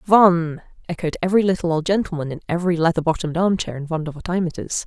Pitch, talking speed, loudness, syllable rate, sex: 170 Hz, 175 wpm, -21 LUFS, 6.8 syllables/s, female